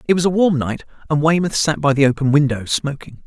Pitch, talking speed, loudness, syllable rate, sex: 145 Hz, 240 wpm, -17 LUFS, 5.8 syllables/s, male